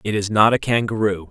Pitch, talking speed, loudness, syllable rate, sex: 105 Hz, 230 wpm, -18 LUFS, 5.8 syllables/s, male